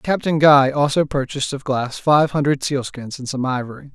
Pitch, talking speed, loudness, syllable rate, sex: 140 Hz, 180 wpm, -18 LUFS, 5.1 syllables/s, male